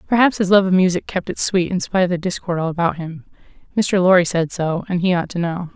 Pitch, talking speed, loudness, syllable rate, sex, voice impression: 180 Hz, 260 wpm, -18 LUFS, 6.2 syllables/s, female, feminine, very adult-like, slightly intellectual, calm, slightly strict